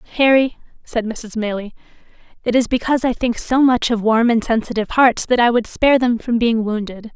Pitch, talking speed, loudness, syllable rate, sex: 235 Hz, 200 wpm, -17 LUFS, 5.7 syllables/s, female